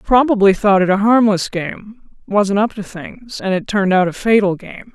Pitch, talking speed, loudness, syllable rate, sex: 205 Hz, 205 wpm, -15 LUFS, 4.8 syllables/s, female